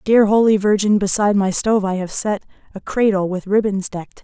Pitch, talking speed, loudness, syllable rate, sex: 200 Hz, 200 wpm, -17 LUFS, 5.7 syllables/s, female